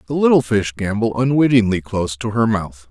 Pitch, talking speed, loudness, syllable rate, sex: 110 Hz, 185 wpm, -17 LUFS, 5.5 syllables/s, male